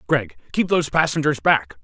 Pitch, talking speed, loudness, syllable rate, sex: 145 Hz, 165 wpm, -20 LUFS, 5.5 syllables/s, male